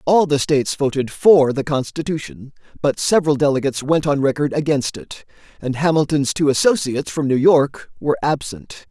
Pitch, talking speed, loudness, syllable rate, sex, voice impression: 145 Hz, 160 wpm, -18 LUFS, 5.4 syllables/s, male, masculine, adult-like, powerful, very fluent, slightly cool, slightly unique, slightly intense